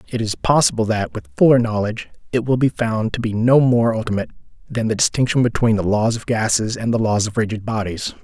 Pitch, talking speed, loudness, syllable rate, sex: 115 Hz, 220 wpm, -18 LUFS, 6.0 syllables/s, male